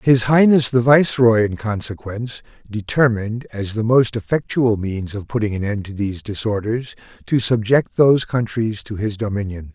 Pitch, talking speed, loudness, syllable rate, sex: 110 Hz, 160 wpm, -18 LUFS, 5.1 syllables/s, male